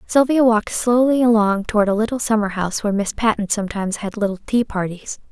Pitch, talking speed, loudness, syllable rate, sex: 215 Hz, 190 wpm, -19 LUFS, 6.3 syllables/s, female